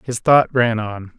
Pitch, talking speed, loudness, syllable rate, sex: 115 Hz, 200 wpm, -16 LUFS, 3.7 syllables/s, male